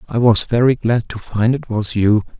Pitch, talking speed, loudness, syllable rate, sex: 115 Hz, 225 wpm, -16 LUFS, 4.7 syllables/s, male